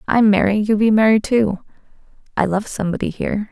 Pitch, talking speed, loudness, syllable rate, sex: 210 Hz, 170 wpm, -17 LUFS, 6.1 syllables/s, female